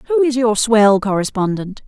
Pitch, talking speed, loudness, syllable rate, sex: 225 Hz, 160 wpm, -15 LUFS, 4.4 syllables/s, female